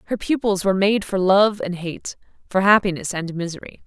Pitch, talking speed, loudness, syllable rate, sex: 190 Hz, 185 wpm, -20 LUFS, 5.4 syllables/s, female